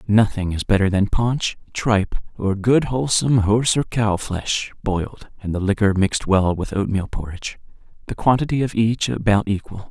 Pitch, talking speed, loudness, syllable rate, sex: 105 Hz, 170 wpm, -20 LUFS, 5.2 syllables/s, male